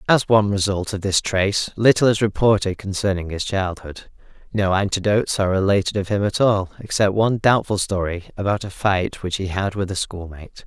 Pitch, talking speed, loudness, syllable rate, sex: 100 Hz, 185 wpm, -20 LUFS, 5.5 syllables/s, male